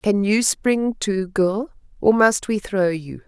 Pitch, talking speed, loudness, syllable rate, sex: 205 Hz, 185 wpm, -20 LUFS, 3.5 syllables/s, female